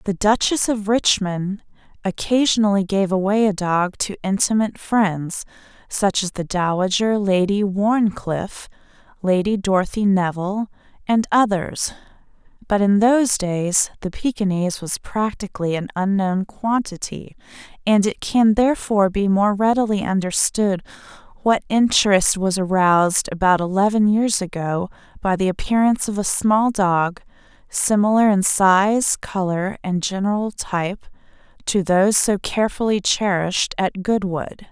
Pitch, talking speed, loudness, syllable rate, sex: 200 Hz, 125 wpm, -19 LUFS, 4.5 syllables/s, female